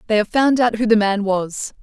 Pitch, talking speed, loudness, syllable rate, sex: 215 Hz, 265 wpm, -17 LUFS, 5.0 syllables/s, female